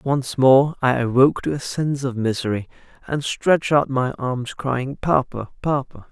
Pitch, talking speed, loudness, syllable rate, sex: 130 Hz, 165 wpm, -20 LUFS, 4.6 syllables/s, male